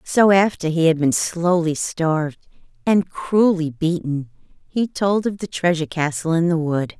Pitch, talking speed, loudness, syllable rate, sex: 165 Hz, 165 wpm, -20 LUFS, 4.4 syllables/s, female